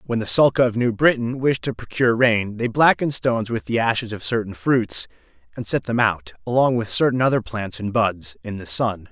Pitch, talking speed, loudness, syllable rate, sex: 110 Hz, 215 wpm, -20 LUFS, 5.3 syllables/s, male